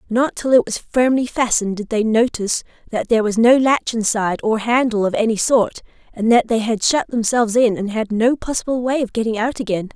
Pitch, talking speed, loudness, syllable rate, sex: 230 Hz, 215 wpm, -18 LUFS, 5.7 syllables/s, female